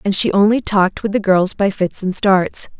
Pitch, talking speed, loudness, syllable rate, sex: 195 Hz, 235 wpm, -16 LUFS, 4.9 syllables/s, female